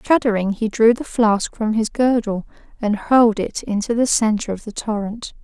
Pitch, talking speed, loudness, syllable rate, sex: 220 Hz, 190 wpm, -19 LUFS, 4.9 syllables/s, female